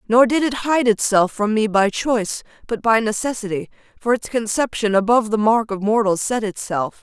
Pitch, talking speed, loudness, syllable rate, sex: 220 Hz, 190 wpm, -19 LUFS, 5.2 syllables/s, female